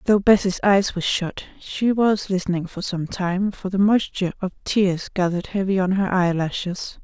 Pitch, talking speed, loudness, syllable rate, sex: 190 Hz, 180 wpm, -21 LUFS, 5.0 syllables/s, female